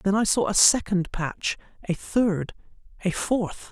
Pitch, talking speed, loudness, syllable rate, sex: 195 Hz, 130 wpm, -24 LUFS, 3.9 syllables/s, female